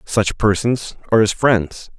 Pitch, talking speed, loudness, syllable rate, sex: 105 Hz, 150 wpm, -17 LUFS, 4.2 syllables/s, male